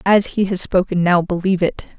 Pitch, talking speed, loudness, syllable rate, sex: 185 Hz, 210 wpm, -17 LUFS, 5.6 syllables/s, female